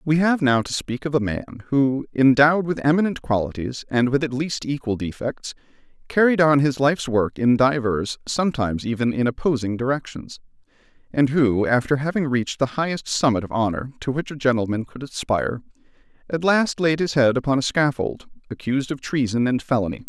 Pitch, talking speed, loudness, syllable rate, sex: 135 Hz, 180 wpm, -21 LUFS, 5.6 syllables/s, male